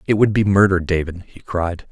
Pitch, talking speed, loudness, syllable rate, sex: 95 Hz, 220 wpm, -18 LUFS, 5.1 syllables/s, male